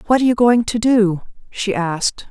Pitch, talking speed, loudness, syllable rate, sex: 220 Hz, 210 wpm, -16 LUFS, 5.5 syllables/s, female